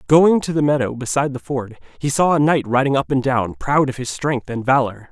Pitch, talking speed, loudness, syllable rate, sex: 135 Hz, 245 wpm, -18 LUFS, 5.5 syllables/s, male